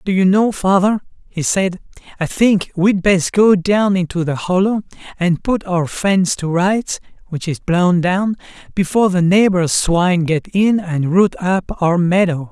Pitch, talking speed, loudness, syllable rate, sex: 185 Hz, 175 wpm, -16 LUFS, 4.2 syllables/s, male